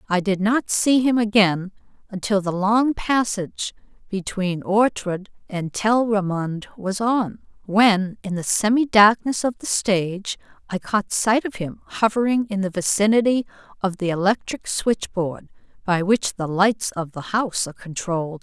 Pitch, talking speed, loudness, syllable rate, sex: 205 Hz, 155 wpm, -21 LUFS, 4.4 syllables/s, female